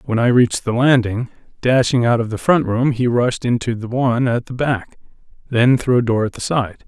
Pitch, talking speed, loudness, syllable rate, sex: 120 Hz, 220 wpm, -17 LUFS, 5.3 syllables/s, male